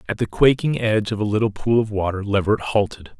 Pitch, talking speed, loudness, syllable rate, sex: 105 Hz, 225 wpm, -20 LUFS, 6.3 syllables/s, male